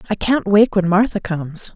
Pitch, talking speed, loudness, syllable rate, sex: 195 Hz, 205 wpm, -17 LUFS, 5.2 syllables/s, female